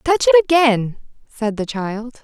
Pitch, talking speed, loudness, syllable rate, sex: 255 Hz, 160 wpm, -17 LUFS, 4.5 syllables/s, female